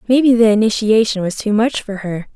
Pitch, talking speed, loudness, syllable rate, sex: 215 Hz, 205 wpm, -15 LUFS, 5.6 syllables/s, female